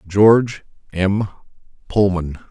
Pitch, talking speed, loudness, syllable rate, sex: 100 Hz, 70 wpm, -17 LUFS, 3.6 syllables/s, male